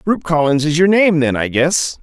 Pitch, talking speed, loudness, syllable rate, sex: 160 Hz, 240 wpm, -14 LUFS, 4.8 syllables/s, male